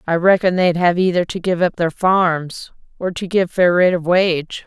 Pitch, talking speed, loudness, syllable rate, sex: 175 Hz, 220 wpm, -17 LUFS, 4.4 syllables/s, female